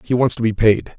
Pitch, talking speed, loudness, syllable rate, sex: 115 Hz, 305 wpm, -17 LUFS, 6.0 syllables/s, male